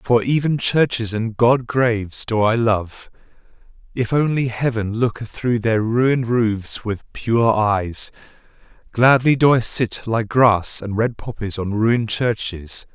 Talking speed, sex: 145 wpm, male